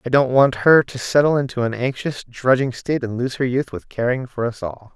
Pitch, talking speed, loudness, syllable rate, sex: 125 Hz, 240 wpm, -19 LUFS, 5.4 syllables/s, male